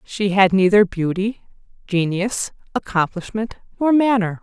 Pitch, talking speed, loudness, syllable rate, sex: 200 Hz, 110 wpm, -19 LUFS, 4.2 syllables/s, female